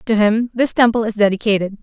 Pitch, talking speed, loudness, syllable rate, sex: 220 Hz, 195 wpm, -16 LUFS, 6.0 syllables/s, female